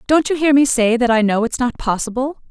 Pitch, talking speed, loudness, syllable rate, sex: 250 Hz, 265 wpm, -16 LUFS, 5.8 syllables/s, female